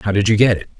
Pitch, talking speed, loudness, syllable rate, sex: 105 Hz, 375 wpm, -15 LUFS, 8.3 syllables/s, male